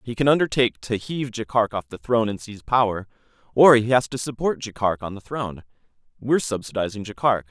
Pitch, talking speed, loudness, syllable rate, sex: 115 Hz, 190 wpm, -22 LUFS, 6.3 syllables/s, male